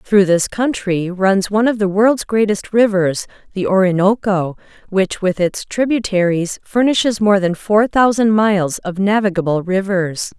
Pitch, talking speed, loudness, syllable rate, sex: 200 Hz, 145 wpm, -16 LUFS, 4.5 syllables/s, female